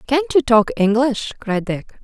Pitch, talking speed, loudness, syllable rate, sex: 245 Hz, 175 wpm, -18 LUFS, 4.1 syllables/s, female